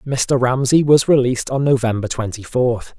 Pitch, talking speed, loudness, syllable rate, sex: 125 Hz, 160 wpm, -17 LUFS, 4.9 syllables/s, male